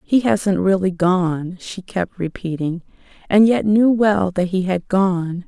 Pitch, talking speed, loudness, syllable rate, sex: 190 Hz, 165 wpm, -18 LUFS, 3.7 syllables/s, female